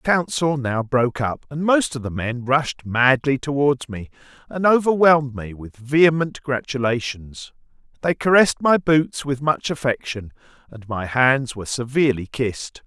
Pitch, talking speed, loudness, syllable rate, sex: 135 Hz, 155 wpm, -20 LUFS, 4.8 syllables/s, male